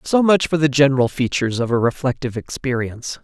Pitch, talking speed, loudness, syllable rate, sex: 135 Hz, 185 wpm, -19 LUFS, 6.4 syllables/s, male